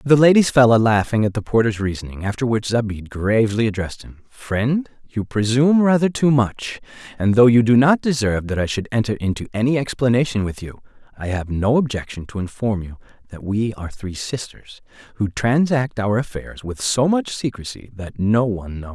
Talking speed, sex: 205 wpm, male